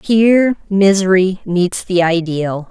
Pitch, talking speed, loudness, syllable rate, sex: 190 Hz, 110 wpm, -14 LUFS, 3.7 syllables/s, female